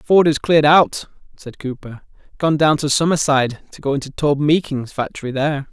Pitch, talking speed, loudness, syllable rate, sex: 145 Hz, 180 wpm, -17 LUFS, 5.4 syllables/s, male